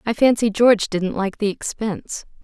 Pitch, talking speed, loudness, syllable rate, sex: 215 Hz, 170 wpm, -19 LUFS, 5.1 syllables/s, female